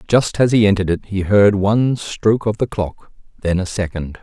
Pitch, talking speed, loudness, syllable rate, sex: 100 Hz, 215 wpm, -17 LUFS, 5.3 syllables/s, male